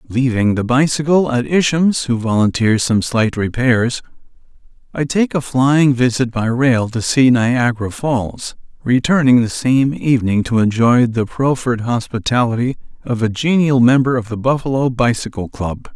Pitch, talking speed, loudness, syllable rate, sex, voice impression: 125 Hz, 145 wpm, -16 LUFS, 4.6 syllables/s, male, masculine, adult-like, tensed, powerful, slightly hard, clear, intellectual, sincere, slightly mature, friendly, reassuring, wild, lively, slightly kind, light